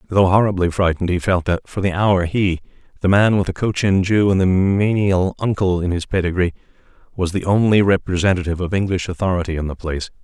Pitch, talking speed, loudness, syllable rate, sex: 95 Hz, 195 wpm, -18 LUFS, 6.0 syllables/s, male